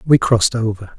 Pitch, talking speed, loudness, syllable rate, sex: 115 Hz, 185 wpm, -16 LUFS, 6.4 syllables/s, male